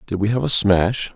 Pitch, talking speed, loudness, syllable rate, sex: 105 Hz, 260 wpm, -18 LUFS, 5.0 syllables/s, male